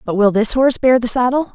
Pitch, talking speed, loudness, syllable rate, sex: 240 Hz, 270 wpm, -14 LUFS, 6.2 syllables/s, female